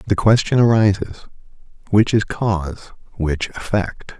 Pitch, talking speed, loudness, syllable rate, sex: 100 Hz, 115 wpm, -18 LUFS, 4.4 syllables/s, male